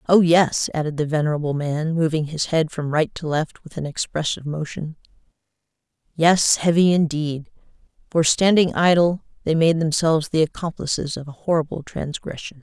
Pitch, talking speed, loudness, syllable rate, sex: 160 Hz, 150 wpm, -21 LUFS, 5.2 syllables/s, female